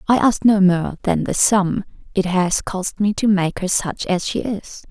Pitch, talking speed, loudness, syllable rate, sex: 195 Hz, 220 wpm, -19 LUFS, 4.2 syllables/s, female